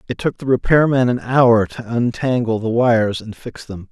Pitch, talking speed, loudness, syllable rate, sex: 120 Hz, 215 wpm, -17 LUFS, 4.8 syllables/s, male